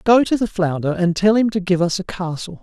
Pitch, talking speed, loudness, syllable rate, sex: 190 Hz, 275 wpm, -18 LUFS, 5.5 syllables/s, male